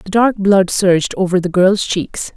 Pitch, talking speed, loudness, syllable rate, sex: 190 Hz, 205 wpm, -14 LUFS, 4.4 syllables/s, female